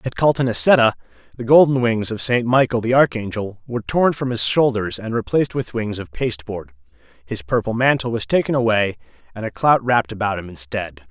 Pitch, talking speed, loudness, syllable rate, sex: 115 Hz, 185 wpm, -19 LUFS, 5.7 syllables/s, male